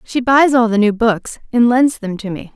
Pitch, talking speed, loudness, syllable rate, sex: 230 Hz, 260 wpm, -14 LUFS, 4.7 syllables/s, female